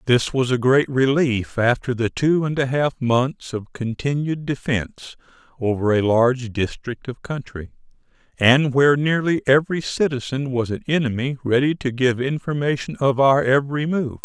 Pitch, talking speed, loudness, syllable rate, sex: 130 Hz, 155 wpm, -20 LUFS, 4.8 syllables/s, male